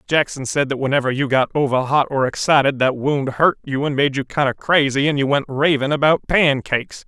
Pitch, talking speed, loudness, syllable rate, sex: 140 Hz, 210 wpm, -18 LUFS, 5.5 syllables/s, male